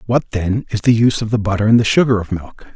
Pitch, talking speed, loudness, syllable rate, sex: 110 Hz, 285 wpm, -16 LUFS, 6.5 syllables/s, male